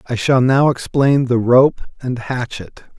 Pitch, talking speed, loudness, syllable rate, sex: 125 Hz, 160 wpm, -15 LUFS, 4.0 syllables/s, male